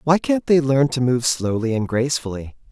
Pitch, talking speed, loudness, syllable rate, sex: 135 Hz, 200 wpm, -19 LUFS, 5.2 syllables/s, male